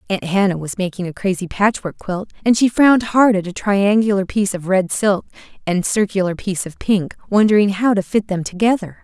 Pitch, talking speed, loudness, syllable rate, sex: 200 Hz, 200 wpm, -17 LUFS, 5.5 syllables/s, female